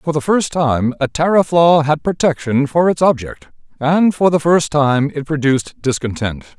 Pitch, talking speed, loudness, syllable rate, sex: 150 Hz, 180 wpm, -15 LUFS, 4.6 syllables/s, male